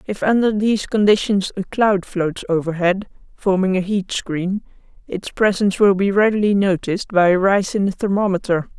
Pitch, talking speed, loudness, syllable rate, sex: 195 Hz, 165 wpm, -18 LUFS, 5.1 syllables/s, female